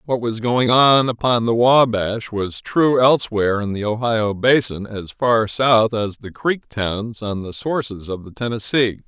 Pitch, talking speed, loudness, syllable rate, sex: 115 Hz, 180 wpm, -18 LUFS, 4.2 syllables/s, male